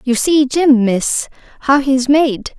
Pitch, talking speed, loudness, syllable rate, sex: 265 Hz, 160 wpm, -14 LUFS, 3.4 syllables/s, female